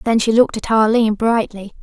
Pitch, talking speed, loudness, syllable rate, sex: 220 Hz, 200 wpm, -16 LUFS, 5.9 syllables/s, female